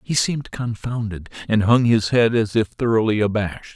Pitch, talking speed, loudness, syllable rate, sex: 110 Hz, 175 wpm, -20 LUFS, 5.2 syllables/s, male